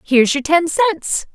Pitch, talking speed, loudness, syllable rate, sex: 315 Hz, 180 wpm, -16 LUFS, 4.2 syllables/s, female